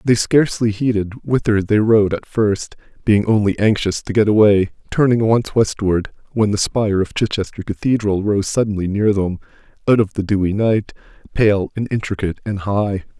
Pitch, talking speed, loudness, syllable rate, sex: 105 Hz, 170 wpm, -17 LUFS, 5.1 syllables/s, male